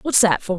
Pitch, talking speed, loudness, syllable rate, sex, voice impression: 215 Hz, 305 wpm, -17 LUFS, 5.6 syllables/s, male, very masculine, very adult-like, slightly middle-aged, very thick, tensed, powerful, bright, slightly hard, slightly muffled, fluent, very cool, intellectual, slightly refreshing, sincere, calm, very mature, slightly friendly, reassuring, wild, slightly sweet, slightly lively, slightly kind, slightly strict